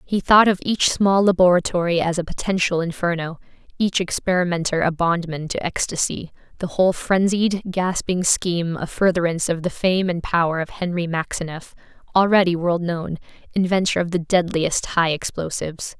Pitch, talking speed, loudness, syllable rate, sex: 175 Hz, 150 wpm, -20 LUFS, 5.2 syllables/s, female